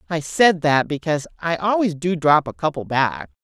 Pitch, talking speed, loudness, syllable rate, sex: 160 Hz, 190 wpm, -19 LUFS, 5.0 syllables/s, female